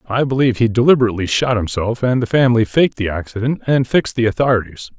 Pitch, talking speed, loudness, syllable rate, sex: 115 Hz, 195 wpm, -16 LUFS, 6.8 syllables/s, male